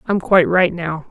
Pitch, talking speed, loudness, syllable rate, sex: 175 Hz, 220 wpm, -16 LUFS, 5.1 syllables/s, female